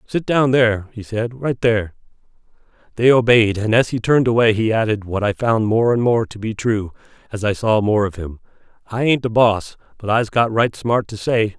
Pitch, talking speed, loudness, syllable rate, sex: 110 Hz, 215 wpm, -18 LUFS, 5.2 syllables/s, male